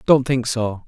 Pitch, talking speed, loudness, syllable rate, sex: 120 Hz, 205 wpm, -19 LUFS, 4.1 syllables/s, male